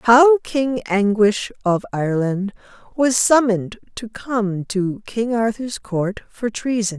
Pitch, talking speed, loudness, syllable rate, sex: 220 Hz, 130 wpm, -19 LUFS, 3.6 syllables/s, female